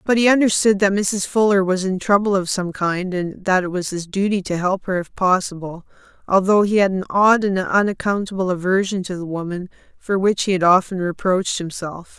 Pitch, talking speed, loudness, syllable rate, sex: 190 Hz, 200 wpm, -19 LUFS, 5.3 syllables/s, female